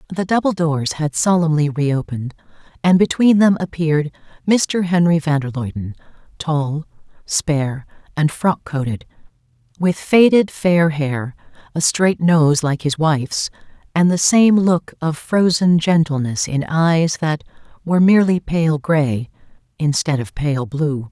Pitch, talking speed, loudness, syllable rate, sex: 160 Hz, 135 wpm, -17 LUFS, 4.2 syllables/s, female